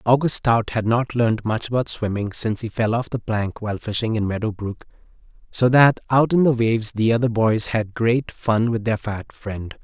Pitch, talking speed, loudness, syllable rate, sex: 115 Hz, 215 wpm, -21 LUFS, 5.0 syllables/s, male